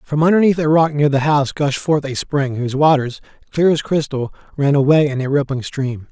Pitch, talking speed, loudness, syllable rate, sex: 145 Hz, 215 wpm, -17 LUFS, 5.5 syllables/s, male